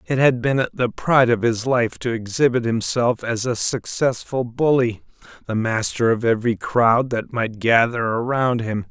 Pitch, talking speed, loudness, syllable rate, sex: 120 Hz, 160 wpm, -20 LUFS, 4.5 syllables/s, male